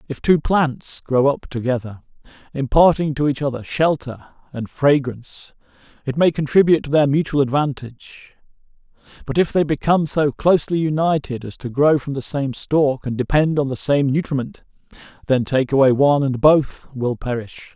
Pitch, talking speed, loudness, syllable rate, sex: 140 Hz, 160 wpm, -19 LUFS, 5.0 syllables/s, male